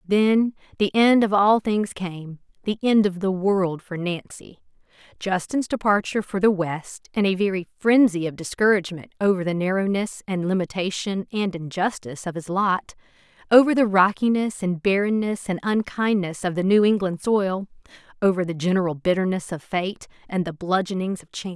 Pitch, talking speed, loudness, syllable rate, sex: 190 Hz, 160 wpm, -22 LUFS, 5.1 syllables/s, female